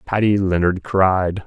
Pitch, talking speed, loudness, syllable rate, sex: 95 Hz, 125 wpm, -18 LUFS, 3.7 syllables/s, male